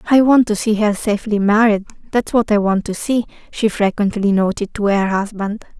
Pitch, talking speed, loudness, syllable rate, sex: 210 Hz, 185 wpm, -17 LUFS, 5.3 syllables/s, female